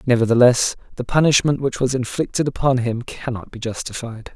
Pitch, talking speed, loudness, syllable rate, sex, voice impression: 125 Hz, 150 wpm, -19 LUFS, 5.5 syllables/s, male, masculine, adult-like, slightly soft, muffled, sincere, reassuring, kind